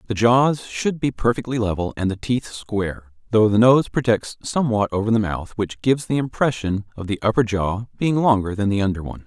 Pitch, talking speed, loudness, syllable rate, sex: 110 Hz, 205 wpm, -21 LUFS, 5.5 syllables/s, male